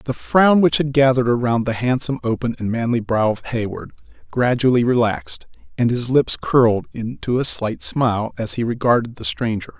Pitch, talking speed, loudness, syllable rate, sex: 120 Hz, 180 wpm, -19 LUFS, 5.3 syllables/s, male